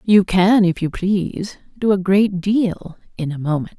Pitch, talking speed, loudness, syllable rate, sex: 190 Hz, 190 wpm, -18 LUFS, 4.2 syllables/s, female